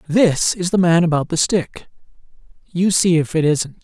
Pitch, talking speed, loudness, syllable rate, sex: 170 Hz, 170 wpm, -17 LUFS, 4.5 syllables/s, male